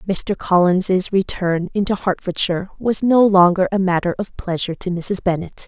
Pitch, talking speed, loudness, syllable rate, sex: 190 Hz, 160 wpm, -18 LUFS, 4.9 syllables/s, female